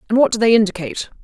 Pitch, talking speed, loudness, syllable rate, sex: 220 Hz, 245 wpm, -16 LUFS, 8.6 syllables/s, female